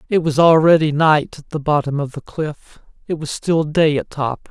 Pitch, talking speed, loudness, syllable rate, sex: 155 Hz, 215 wpm, -17 LUFS, 4.7 syllables/s, male